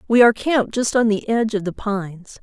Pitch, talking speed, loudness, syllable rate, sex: 215 Hz, 245 wpm, -19 LUFS, 6.2 syllables/s, female